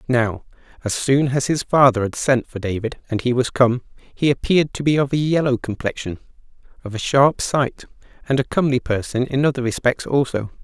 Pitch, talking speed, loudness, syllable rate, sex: 130 Hz, 190 wpm, -20 LUFS, 5.4 syllables/s, male